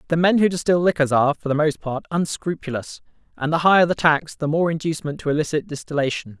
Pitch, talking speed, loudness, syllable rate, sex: 155 Hz, 205 wpm, -21 LUFS, 6.4 syllables/s, male